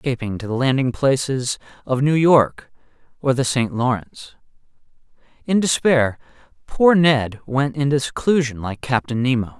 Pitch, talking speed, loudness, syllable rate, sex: 130 Hz, 140 wpm, -19 LUFS, 4.8 syllables/s, male